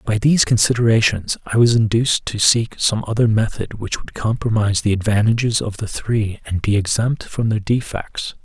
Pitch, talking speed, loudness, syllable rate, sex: 110 Hz, 180 wpm, -18 LUFS, 5.1 syllables/s, male